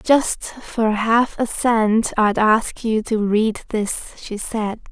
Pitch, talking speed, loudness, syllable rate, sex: 220 Hz, 160 wpm, -19 LUFS, 2.8 syllables/s, female